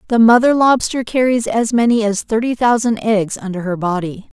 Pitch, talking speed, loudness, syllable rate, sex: 225 Hz, 175 wpm, -15 LUFS, 5.1 syllables/s, female